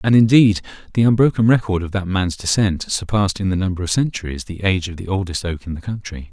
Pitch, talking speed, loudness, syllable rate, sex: 95 Hz, 230 wpm, -19 LUFS, 6.3 syllables/s, male